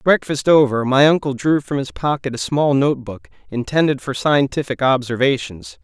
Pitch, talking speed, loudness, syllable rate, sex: 135 Hz, 155 wpm, -18 LUFS, 5.1 syllables/s, male